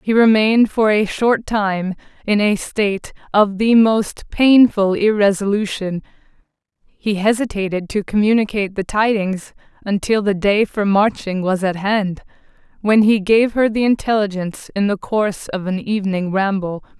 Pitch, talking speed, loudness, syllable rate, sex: 205 Hz, 145 wpm, -17 LUFS, 4.6 syllables/s, female